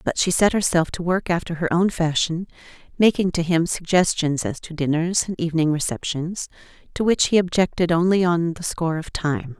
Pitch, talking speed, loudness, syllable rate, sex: 170 Hz, 190 wpm, -21 LUFS, 5.3 syllables/s, female